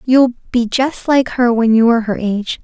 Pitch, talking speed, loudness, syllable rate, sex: 240 Hz, 230 wpm, -14 LUFS, 4.8 syllables/s, female